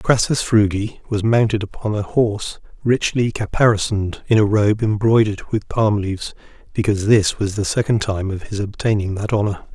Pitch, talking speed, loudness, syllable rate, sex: 105 Hz, 165 wpm, -19 LUFS, 5.3 syllables/s, male